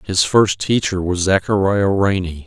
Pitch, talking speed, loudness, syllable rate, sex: 95 Hz, 145 wpm, -17 LUFS, 4.2 syllables/s, male